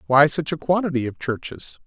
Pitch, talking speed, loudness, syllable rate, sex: 150 Hz, 195 wpm, -21 LUFS, 5.4 syllables/s, male